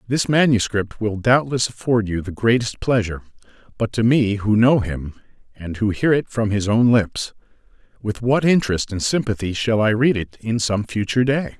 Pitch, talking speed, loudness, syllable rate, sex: 110 Hz, 180 wpm, -19 LUFS, 5.0 syllables/s, male